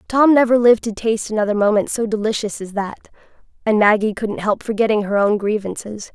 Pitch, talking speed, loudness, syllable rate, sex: 215 Hz, 185 wpm, -18 LUFS, 5.9 syllables/s, female